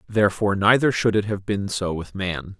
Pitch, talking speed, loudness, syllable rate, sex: 100 Hz, 210 wpm, -22 LUFS, 5.4 syllables/s, male